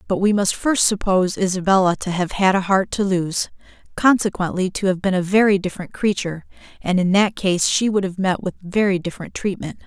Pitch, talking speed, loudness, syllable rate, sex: 190 Hz, 195 wpm, -19 LUFS, 5.7 syllables/s, female